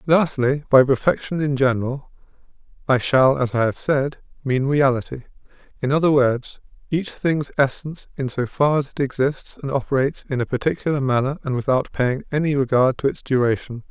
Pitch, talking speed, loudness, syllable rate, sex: 135 Hz, 165 wpm, -20 LUFS, 5.4 syllables/s, male